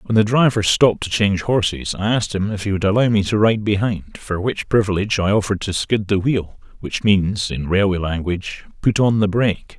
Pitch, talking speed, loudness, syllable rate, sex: 100 Hz, 220 wpm, -18 LUFS, 5.6 syllables/s, male